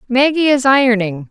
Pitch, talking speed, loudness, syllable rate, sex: 245 Hz, 140 wpm, -13 LUFS, 5.2 syllables/s, female